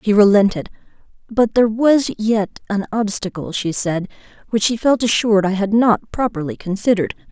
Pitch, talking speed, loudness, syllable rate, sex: 210 Hz, 155 wpm, -17 LUFS, 5.3 syllables/s, female